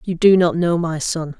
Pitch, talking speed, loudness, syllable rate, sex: 170 Hz, 255 wpm, -17 LUFS, 4.7 syllables/s, female